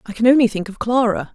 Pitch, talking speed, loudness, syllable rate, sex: 225 Hz, 270 wpm, -17 LUFS, 6.5 syllables/s, female